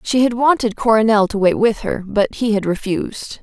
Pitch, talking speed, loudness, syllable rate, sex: 220 Hz, 210 wpm, -17 LUFS, 5.2 syllables/s, female